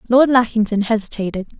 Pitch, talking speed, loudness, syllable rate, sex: 220 Hz, 115 wpm, -17 LUFS, 6.0 syllables/s, female